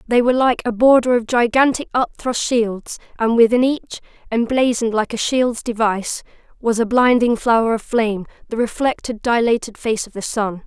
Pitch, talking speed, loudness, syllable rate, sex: 235 Hz, 165 wpm, -18 LUFS, 5.3 syllables/s, female